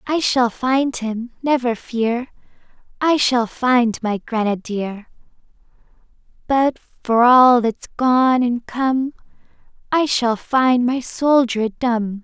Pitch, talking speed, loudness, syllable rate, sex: 245 Hz, 120 wpm, -18 LUFS, 3.1 syllables/s, female